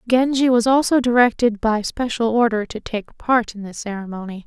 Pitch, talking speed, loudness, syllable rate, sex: 230 Hz, 175 wpm, -19 LUFS, 5.2 syllables/s, female